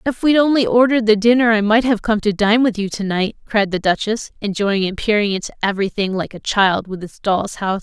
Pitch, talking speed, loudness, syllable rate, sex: 210 Hz, 240 wpm, -17 LUFS, 5.8 syllables/s, female